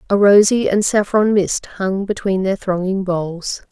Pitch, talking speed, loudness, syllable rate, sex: 195 Hz, 160 wpm, -17 LUFS, 4.4 syllables/s, female